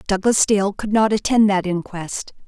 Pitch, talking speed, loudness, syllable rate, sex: 200 Hz, 170 wpm, -19 LUFS, 4.5 syllables/s, female